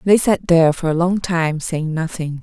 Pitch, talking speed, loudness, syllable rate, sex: 170 Hz, 225 wpm, -17 LUFS, 4.8 syllables/s, female